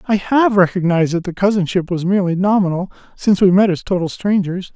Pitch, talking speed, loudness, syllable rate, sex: 185 Hz, 190 wpm, -16 LUFS, 6.2 syllables/s, male